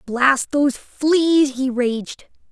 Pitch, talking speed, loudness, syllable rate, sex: 270 Hz, 120 wpm, -18 LUFS, 2.7 syllables/s, female